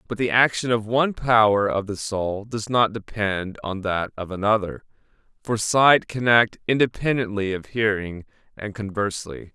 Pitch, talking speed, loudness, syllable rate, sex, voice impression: 110 Hz, 155 wpm, -22 LUFS, 4.7 syllables/s, male, masculine, adult-like, slightly middle-aged, slightly thick, slightly tensed, slightly weak, bright, soft, clear, slightly halting, slightly cool, intellectual, refreshing, very sincere, very calm, slightly mature, friendly, reassuring, slightly unique, elegant, slightly wild, slightly sweet, slightly lively, kind, modest